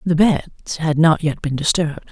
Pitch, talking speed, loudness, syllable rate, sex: 160 Hz, 200 wpm, -18 LUFS, 5.4 syllables/s, female